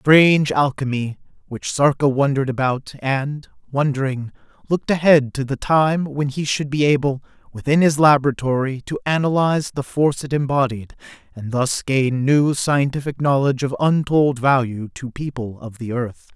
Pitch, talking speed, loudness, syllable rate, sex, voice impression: 140 Hz, 150 wpm, -19 LUFS, 4.9 syllables/s, male, masculine, adult-like, slightly refreshing, sincere, slightly lively